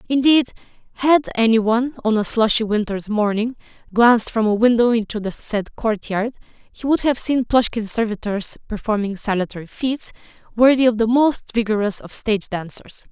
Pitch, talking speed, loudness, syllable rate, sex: 225 Hz, 155 wpm, -19 LUFS, 5.2 syllables/s, female